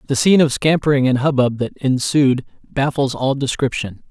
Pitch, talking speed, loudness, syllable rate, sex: 135 Hz, 160 wpm, -17 LUFS, 5.1 syllables/s, male